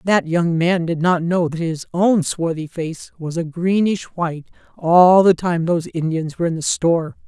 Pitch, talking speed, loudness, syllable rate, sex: 170 Hz, 200 wpm, -18 LUFS, 4.7 syllables/s, female